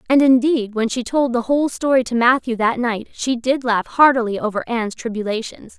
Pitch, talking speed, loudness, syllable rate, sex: 240 Hz, 195 wpm, -18 LUFS, 5.4 syllables/s, female